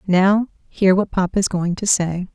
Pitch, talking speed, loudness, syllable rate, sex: 190 Hz, 205 wpm, -18 LUFS, 4.6 syllables/s, female